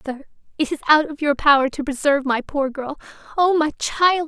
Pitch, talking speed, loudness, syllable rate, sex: 290 Hz, 195 wpm, -19 LUFS, 5.4 syllables/s, female